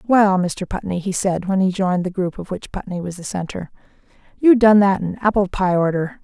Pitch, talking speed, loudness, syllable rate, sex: 190 Hz, 220 wpm, -19 LUFS, 5.4 syllables/s, female